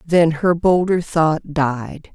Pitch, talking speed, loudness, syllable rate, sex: 160 Hz, 140 wpm, -18 LUFS, 3.0 syllables/s, female